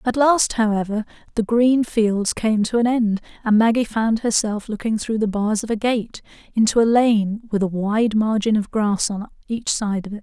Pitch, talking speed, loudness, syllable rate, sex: 220 Hz, 205 wpm, -20 LUFS, 4.6 syllables/s, female